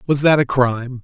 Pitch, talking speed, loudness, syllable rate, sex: 130 Hz, 235 wpm, -16 LUFS, 5.6 syllables/s, male